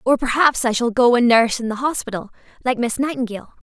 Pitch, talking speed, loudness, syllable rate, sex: 240 Hz, 210 wpm, -18 LUFS, 6.4 syllables/s, female